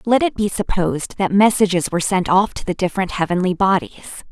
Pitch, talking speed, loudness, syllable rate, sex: 190 Hz, 195 wpm, -18 LUFS, 6.3 syllables/s, female